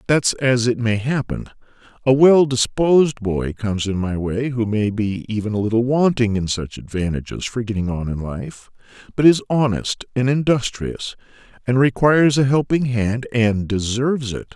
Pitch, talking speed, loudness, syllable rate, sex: 120 Hz, 170 wpm, -19 LUFS, 4.8 syllables/s, male